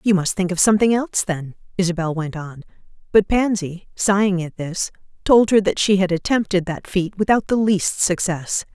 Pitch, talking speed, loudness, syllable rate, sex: 190 Hz, 185 wpm, -19 LUFS, 5.1 syllables/s, female